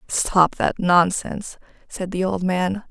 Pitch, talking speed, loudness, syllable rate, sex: 185 Hz, 145 wpm, -20 LUFS, 3.8 syllables/s, female